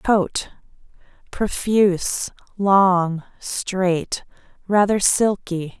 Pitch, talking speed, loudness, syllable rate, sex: 190 Hz, 50 wpm, -20 LUFS, 2.4 syllables/s, female